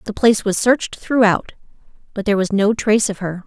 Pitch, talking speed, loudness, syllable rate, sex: 210 Hz, 210 wpm, -17 LUFS, 6.2 syllables/s, female